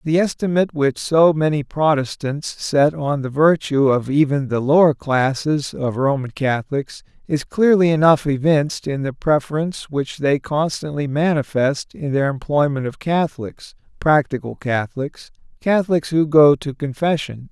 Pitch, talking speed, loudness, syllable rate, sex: 145 Hz, 135 wpm, -19 LUFS, 4.6 syllables/s, male